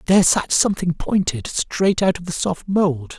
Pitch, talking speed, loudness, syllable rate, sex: 175 Hz, 190 wpm, -19 LUFS, 4.7 syllables/s, male